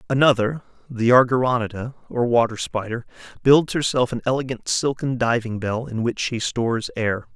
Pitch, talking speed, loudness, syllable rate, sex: 120 Hz, 145 wpm, -21 LUFS, 5.1 syllables/s, male